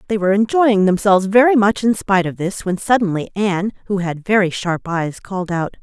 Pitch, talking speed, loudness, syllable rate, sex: 195 Hz, 205 wpm, -17 LUFS, 5.7 syllables/s, female